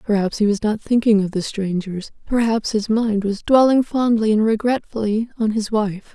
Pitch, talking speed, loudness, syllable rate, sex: 215 Hz, 185 wpm, -19 LUFS, 5.1 syllables/s, female